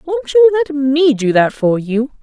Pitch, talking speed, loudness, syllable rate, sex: 270 Hz, 215 wpm, -14 LUFS, 3.9 syllables/s, female